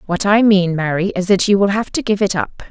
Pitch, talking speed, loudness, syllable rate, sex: 195 Hz, 290 wpm, -15 LUFS, 5.7 syllables/s, female